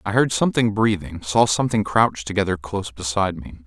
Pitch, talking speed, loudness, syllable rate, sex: 100 Hz, 180 wpm, -21 LUFS, 6.3 syllables/s, male